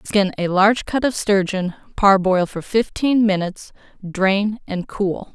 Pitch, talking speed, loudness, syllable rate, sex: 200 Hz, 145 wpm, -19 LUFS, 4.1 syllables/s, female